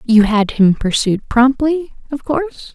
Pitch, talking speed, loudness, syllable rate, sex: 255 Hz, 155 wpm, -15 LUFS, 4.0 syllables/s, female